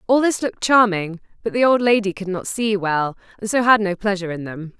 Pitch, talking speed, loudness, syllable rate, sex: 205 Hz, 240 wpm, -19 LUFS, 5.7 syllables/s, female